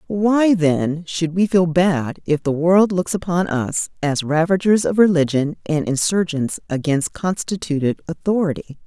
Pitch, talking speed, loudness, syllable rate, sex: 170 Hz, 140 wpm, -19 LUFS, 4.2 syllables/s, female